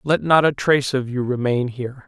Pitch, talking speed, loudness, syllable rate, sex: 130 Hz, 230 wpm, -19 LUFS, 5.6 syllables/s, male